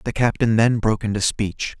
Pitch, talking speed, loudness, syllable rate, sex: 110 Hz, 200 wpm, -20 LUFS, 5.5 syllables/s, male